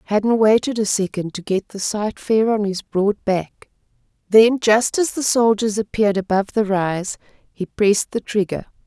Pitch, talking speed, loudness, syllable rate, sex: 210 Hz, 175 wpm, -19 LUFS, 4.7 syllables/s, female